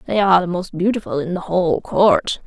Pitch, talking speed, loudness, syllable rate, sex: 180 Hz, 220 wpm, -18 LUFS, 5.7 syllables/s, female